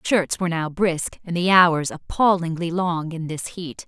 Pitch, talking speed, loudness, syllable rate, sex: 170 Hz, 185 wpm, -21 LUFS, 4.3 syllables/s, female